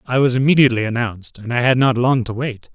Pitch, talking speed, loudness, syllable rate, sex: 125 Hz, 240 wpm, -17 LUFS, 6.6 syllables/s, male